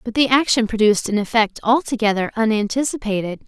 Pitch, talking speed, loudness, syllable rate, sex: 225 Hz, 140 wpm, -18 LUFS, 6.1 syllables/s, female